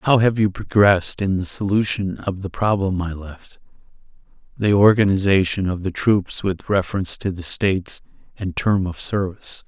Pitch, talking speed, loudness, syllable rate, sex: 95 Hz, 155 wpm, -20 LUFS, 4.9 syllables/s, male